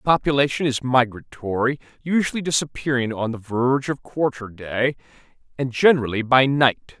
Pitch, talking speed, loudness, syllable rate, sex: 130 Hz, 135 wpm, -21 LUFS, 5.3 syllables/s, male